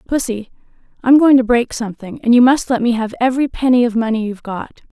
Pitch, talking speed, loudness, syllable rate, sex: 235 Hz, 220 wpm, -15 LUFS, 6.5 syllables/s, female